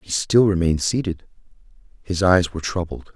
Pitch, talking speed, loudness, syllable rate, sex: 90 Hz, 150 wpm, -20 LUFS, 5.6 syllables/s, male